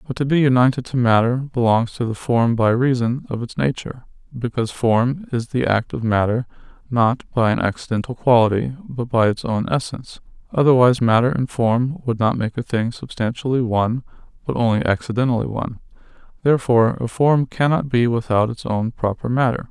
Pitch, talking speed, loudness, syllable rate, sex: 120 Hz, 175 wpm, -19 LUFS, 5.6 syllables/s, male